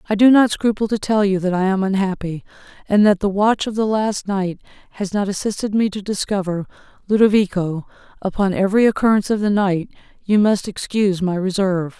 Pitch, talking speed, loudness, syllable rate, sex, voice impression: 200 Hz, 185 wpm, -18 LUFS, 5.7 syllables/s, female, feminine, adult-like, slightly relaxed, powerful, slightly bright, slightly muffled, raspy, intellectual, friendly, reassuring, slightly lively, slightly sharp